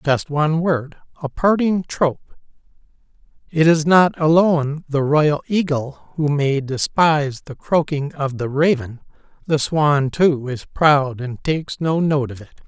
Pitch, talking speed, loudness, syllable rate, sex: 150 Hz, 150 wpm, -18 LUFS, 4.3 syllables/s, male